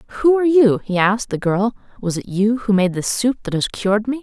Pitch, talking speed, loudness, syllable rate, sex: 220 Hz, 255 wpm, -18 LUFS, 6.2 syllables/s, female